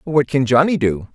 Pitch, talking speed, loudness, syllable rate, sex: 135 Hz, 210 wpm, -17 LUFS, 4.9 syllables/s, male